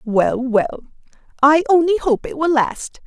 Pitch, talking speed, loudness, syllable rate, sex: 285 Hz, 155 wpm, -17 LUFS, 4.0 syllables/s, female